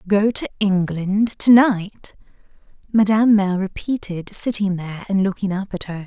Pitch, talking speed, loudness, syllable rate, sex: 200 Hz, 150 wpm, -19 LUFS, 5.0 syllables/s, female